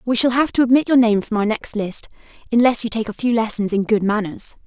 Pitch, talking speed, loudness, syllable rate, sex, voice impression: 225 Hz, 255 wpm, -18 LUFS, 5.9 syllables/s, female, very feminine, young, thin, tensed, slightly powerful, bright, slightly soft, very clear, very fluent, raspy, very cute, intellectual, very refreshing, sincere, calm, friendly, reassuring, slightly unique, elegant, wild, sweet, lively, strict, slightly intense, slightly modest